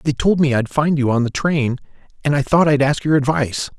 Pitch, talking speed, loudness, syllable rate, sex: 140 Hz, 255 wpm, -17 LUFS, 5.7 syllables/s, male